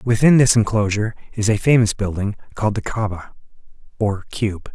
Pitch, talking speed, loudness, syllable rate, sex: 105 Hz, 165 wpm, -19 LUFS, 6.0 syllables/s, male